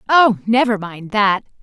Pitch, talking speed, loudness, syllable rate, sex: 215 Hz, 150 wpm, -16 LUFS, 4.2 syllables/s, female